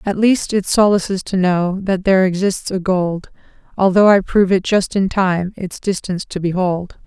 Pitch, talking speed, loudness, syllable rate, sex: 190 Hz, 185 wpm, -16 LUFS, 4.8 syllables/s, female